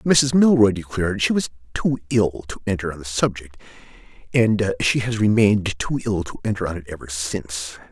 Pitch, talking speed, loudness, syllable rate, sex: 100 Hz, 180 wpm, -21 LUFS, 5.4 syllables/s, male